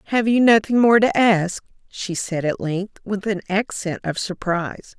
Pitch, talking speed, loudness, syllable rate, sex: 200 Hz, 180 wpm, -20 LUFS, 4.5 syllables/s, female